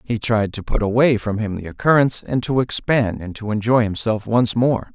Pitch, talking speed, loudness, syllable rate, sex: 115 Hz, 220 wpm, -19 LUFS, 5.2 syllables/s, male